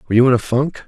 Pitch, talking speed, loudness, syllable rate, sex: 125 Hz, 340 wpm, -16 LUFS, 8.7 syllables/s, male